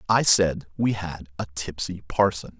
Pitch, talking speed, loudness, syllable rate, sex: 90 Hz, 160 wpm, -24 LUFS, 4.4 syllables/s, male